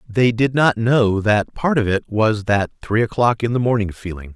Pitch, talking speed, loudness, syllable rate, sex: 110 Hz, 220 wpm, -18 LUFS, 4.7 syllables/s, male